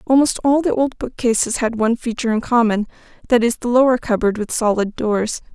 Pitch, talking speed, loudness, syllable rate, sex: 235 Hz, 195 wpm, -18 LUFS, 5.8 syllables/s, female